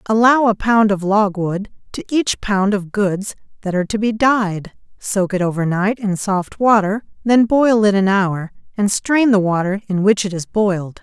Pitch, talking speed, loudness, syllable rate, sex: 205 Hz, 195 wpm, -17 LUFS, 4.4 syllables/s, female